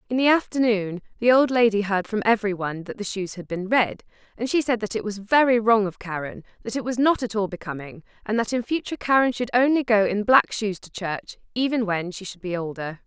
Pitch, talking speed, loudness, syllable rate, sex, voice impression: 215 Hz, 235 wpm, -23 LUFS, 5.7 syllables/s, female, very feminine, slightly gender-neutral, very adult-like, slightly thin, tensed, slightly powerful, bright, slightly soft, clear, fluent, slightly raspy, cute, slightly cool, intellectual, refreshing, sincere, slightly calm, friendly, very reassuring, very unique, elegant, wild, very sweet, very lively, strict, intense, slightly sharp